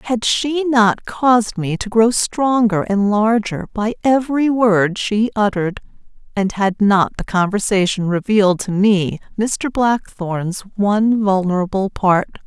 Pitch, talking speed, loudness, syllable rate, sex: 210 Hz, 135 wpm, -17 LUFS, 4.0 syllables/s, female